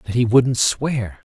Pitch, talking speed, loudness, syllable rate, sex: 120 Hz, 185 wpm, -18 LUFS, 3.7 syllables/s, male